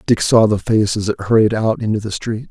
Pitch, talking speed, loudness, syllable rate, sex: 105 Hz, 265 wpm, -16 LUFS, 5.8 syllables/s, male